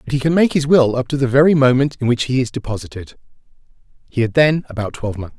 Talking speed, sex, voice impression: 265 wpm, male, masculine, adult-like, tensed, powerful, clear, fluent, cool, intellectual, calm, friendly, slightly reassuring, slightly wild, lively, kind